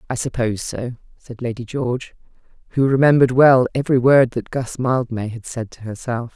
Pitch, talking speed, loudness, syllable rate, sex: 125 Hz, 170 wpm, -19 LUFS, 5.5 syllables/s, female